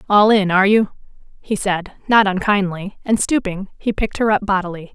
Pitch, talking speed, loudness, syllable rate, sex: 200 Hz, 180 wpm, -17 LUFS, 5.5 syllables/s, female